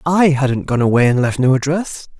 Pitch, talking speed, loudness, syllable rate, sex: 140 Hz, 220 wpm, -15 LUFS, 5.0 syllables/s, male